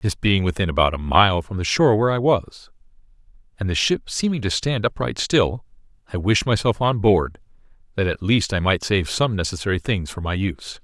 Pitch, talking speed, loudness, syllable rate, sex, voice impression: 100 Hz, 205 wpm, -21 LUFS, 5.4 syllables/s, male, very masculine, slightly old, very thick, slightly tensed, very powerful, bright, very soft, very muffled, fluent, raspy, very cool, intellectual, slightly refreshing, sincere, very calm, very mature, very friendly, very reassuring, very unique, elegant, very wild, sweet, lively, very kind